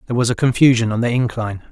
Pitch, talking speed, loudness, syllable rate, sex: 115 Hz, 245 wpm, -17 LUFS, 7.8 syllables/s, male